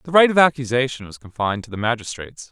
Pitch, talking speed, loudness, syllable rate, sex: 125 Hz, 215 wpm, -19 LUFS, 6.9 syllables/s, male